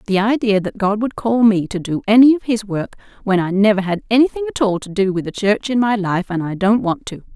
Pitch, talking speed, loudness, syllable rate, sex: 210 Hz, 270 wpm, -17 LUFS, 5.8 syllables/s, female